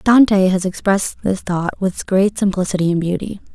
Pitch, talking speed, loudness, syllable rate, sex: 190 Hz, 170 wpm, -17 LUFS, 5.2 syllables/s, female